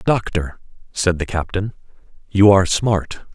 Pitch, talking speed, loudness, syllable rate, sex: 95 Hz, 125 wpm, -18 LUFS, 4.3 syllables/s, male